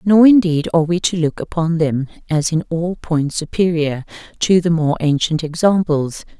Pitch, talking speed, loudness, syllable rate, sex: 165 Hz, 170 wpm, -17 LUFS, 4.7 syllables/s, female